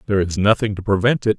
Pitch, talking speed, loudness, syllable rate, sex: 105 Hz, 260 wpm, -18 LUFS, 7.3 syllables/s, male